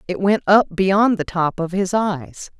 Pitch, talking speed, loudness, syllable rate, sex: 185 Hz, 210 wpm, -18 LUFS, 3.8 syllables/s, female